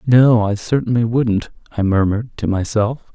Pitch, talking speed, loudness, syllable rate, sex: 110 Hz, 155 wpm, -17 LUFS, 5.0 syllables/s, male